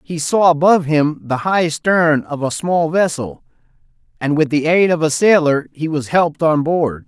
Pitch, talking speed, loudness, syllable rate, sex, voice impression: 160 Hz, 195 wpm, -16 LUFS, 4.6 syllables/s, male, very masculine, middle-aged, thick, tensed, powerful, bright, soft, slightly clear, fluent, slightly halting, slightly raspy, cool, intellectual, slightly refreshing, sincere, calm, mature, slightly friendly, slightly reassuring, slightly unique, slightly elegant, wild, slightly sweet, lively, kind, slightly strict, slightly intense, slightly sharp